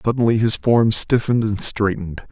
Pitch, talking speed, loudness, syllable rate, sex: 110 Hz, 155 wpm, -17 LUFS, 5.4 syllables/s, male